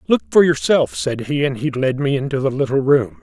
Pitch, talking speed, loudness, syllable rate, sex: 140 Hz, 240 wpm, -18 LUFS, 5.4 syllables/s, male